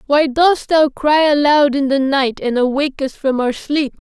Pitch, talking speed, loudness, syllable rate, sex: 280 Hz, 205 wpm, -15 LUFS, 4.5 syllables/s, female